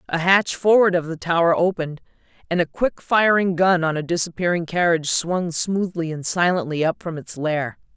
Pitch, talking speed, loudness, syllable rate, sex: 170 Hz, 180 wpm, -20 LUFS, 5.2 syllables/s, female